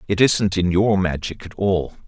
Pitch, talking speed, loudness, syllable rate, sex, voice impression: 95 Hz, 205 wpm, -19 LUFS, 4.4 syllables/s, male, masculine, adult-like, tensed, slightly bright, clear, fluent, cool, intellectual, sincere, calm, slightly friendly, slightly reassuring, slightly wild, lively, slightly kind